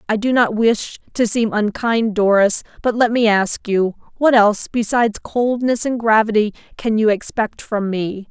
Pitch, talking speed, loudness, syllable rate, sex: 220 Hz, 165 wpm, -17 LUFS, 4.5 syllables/s, female